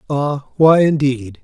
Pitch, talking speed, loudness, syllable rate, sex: 145 Hz, 125 wpm, -15 LUFS, 3.5 syllables/s, male